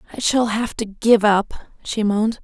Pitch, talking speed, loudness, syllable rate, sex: 215 Hz, 195 wpm, -19 LUFS, 4.7 syllables/s, female